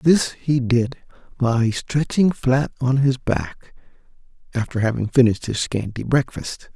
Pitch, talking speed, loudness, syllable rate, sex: 125 Hz, 135 wpm, -21 LUFS, 4.1 syllables/s, male